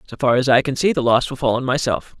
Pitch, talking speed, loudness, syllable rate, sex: 130 Hz, 325 wpm, -18 LUFS, 6.4 syllables/s, male